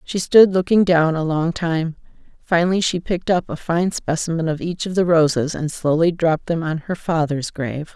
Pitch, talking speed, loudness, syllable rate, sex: 165 Hz, 205 wpm, -19 LUFS, 5.1 syllables/s, female